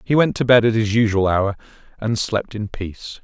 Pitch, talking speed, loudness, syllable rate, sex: 110 Hz, 225 wpm, -19 LUFS, 5.2 syllables/s, male